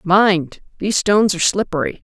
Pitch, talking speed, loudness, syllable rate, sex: 190 Hz, 140 wpm, -17 LUFS, 5.7 syllables/s, female